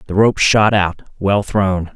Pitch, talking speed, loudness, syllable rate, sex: 100 Hz, 185 wpm, -15 LUFS, 3.7 syllables/s, male